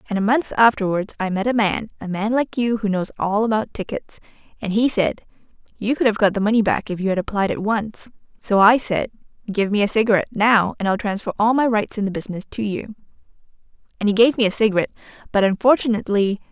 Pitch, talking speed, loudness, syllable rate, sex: 210 Hz, 210 wpm, -20 LUFS, 6.3 syllables/s, female